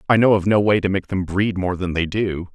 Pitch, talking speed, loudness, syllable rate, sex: 95 Hz, 305 wpm, -19 LUFS, 5.5 syllables/s, male